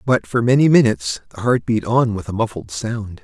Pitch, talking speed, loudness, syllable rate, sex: 110 Hz, 220 wpm, -18 LUFS, 5.4 syllables/s, male